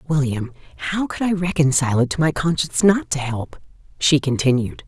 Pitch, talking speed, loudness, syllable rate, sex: 150 Hz, 170 wpm, -20 LUFS, 5.6 syllables/s, female